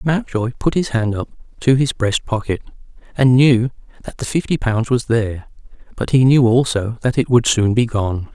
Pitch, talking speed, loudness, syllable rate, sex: 120 Hz, 195 wpm, -17 LUFS, 4.9 syllables/s, male